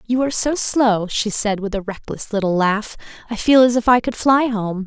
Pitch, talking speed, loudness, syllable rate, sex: 225 Hz, 235 wpm, -18 LUFS, 5.0 syllables/s, female